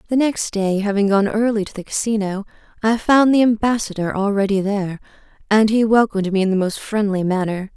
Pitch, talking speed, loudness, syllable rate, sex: 210 Hz, 185 wpm, -18 LUFS, 5.7 syllables/s, female